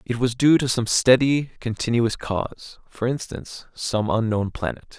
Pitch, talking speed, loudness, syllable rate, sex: 120 Hz, 145 wpm, -22 LUFS, 4.5 syllables/s, male